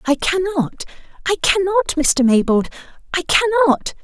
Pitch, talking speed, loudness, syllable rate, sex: 330 Hz, 105 wpm, -17 LUFS, 4.1 syllables/s, female